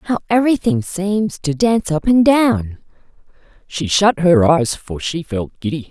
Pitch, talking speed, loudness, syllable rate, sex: 170 Hz, 165 wpm, -16 LUFS, 4.4 syllables/s, male